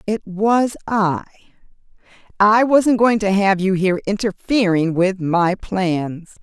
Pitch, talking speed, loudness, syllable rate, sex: 200 Hz, 130 wpm, -17 LUFS, 3.7 syllables/s, female